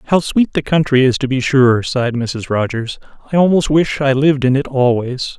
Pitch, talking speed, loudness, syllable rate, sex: 135 Hz, 210 wpm, -15 LUFS, 5.2 syllables/s, male